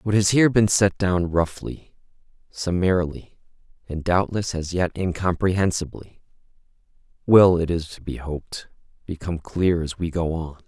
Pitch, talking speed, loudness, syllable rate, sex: 90 Hz, 140 wpm, -22 LUFS, 4.8 syllables/s, male